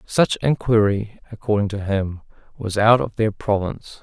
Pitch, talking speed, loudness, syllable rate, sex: 105 Hz, 150 wpm, -20 LUFS, 4.6 syllables/s, male